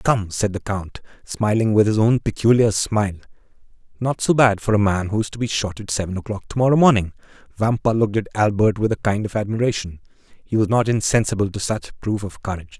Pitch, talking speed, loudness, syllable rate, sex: 105 Hz, 215 wpm, -20 LUFS, 6.0 syllables/s, male